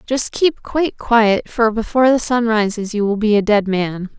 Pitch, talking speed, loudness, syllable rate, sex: 225 Hz, 215 wpm, -16 LUFS, 4.8 syllables/s, female